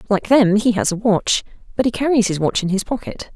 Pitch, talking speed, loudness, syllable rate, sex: 205 Hz, 250 wpm, -18 LUFS, 5.7 syllables/s, female